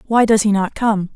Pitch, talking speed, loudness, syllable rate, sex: 210 Hz, 260 wpm, -16 LUFS, 5.3 syllables/s, female